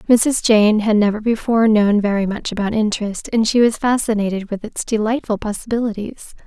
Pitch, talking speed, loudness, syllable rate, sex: 215 Hz, 165 wpm, -17 LUFS, 5.5 syllables/s, female